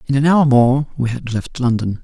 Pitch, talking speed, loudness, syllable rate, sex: 130 Hz, 235 wpm, -16 LUFS, 5.0 syllables/s, male